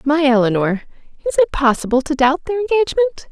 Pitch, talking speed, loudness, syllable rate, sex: 300 Hz, 165 wpm, -17 LUFS, 7.0 syllables/s, female